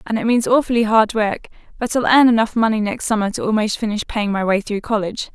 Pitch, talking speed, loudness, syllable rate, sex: 220 Hz, 235 wpm, -18 LUFS, 6.2 syllables/s, female